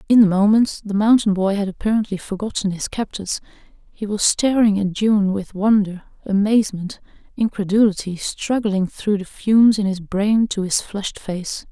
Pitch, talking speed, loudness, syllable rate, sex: 205 Hz, 155 wpm, -19 LUFS, 4.8 syllables/s, female